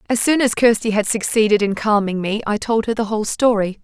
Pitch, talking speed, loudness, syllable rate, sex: 215 Hz, 235 wpm, -17 LUFS, 5.9 syllables/s, female